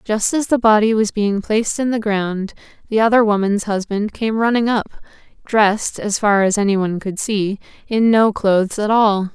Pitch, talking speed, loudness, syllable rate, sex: 210 Hz, 185 wpm, -17 LUFS, 4.9 syllables/s, female